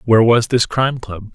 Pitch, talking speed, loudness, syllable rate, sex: 115 Hz, 225 wpm, -15 LUFS, 5.7 syllables/s, male